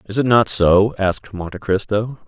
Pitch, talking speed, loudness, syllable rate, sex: 105 Hz, 185 wpm, -17 LUFS, 5.0 syllables/s, male